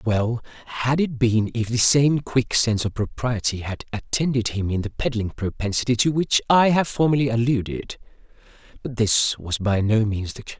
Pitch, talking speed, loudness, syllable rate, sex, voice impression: 120 Hz, 175 wpm, -21 LUFS, 5.0 syllables/s, male, very masculine, slightly young, slightly thick, slightly relaxed, powerful, slightly dark, soft, slightly muffled, fluent, cool, intellectual, slightly refreshing, slightly sincere, slightly calm, slightly friendly, slightly reassuring, unique, slightly elegant, wild, slightly sweet, lively, slightly strict, slightly intense, slightly modest